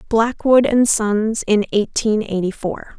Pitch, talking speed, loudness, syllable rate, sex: 215 Hz, 140 wpm, -17 LUFS, 3.7 syllables/s, female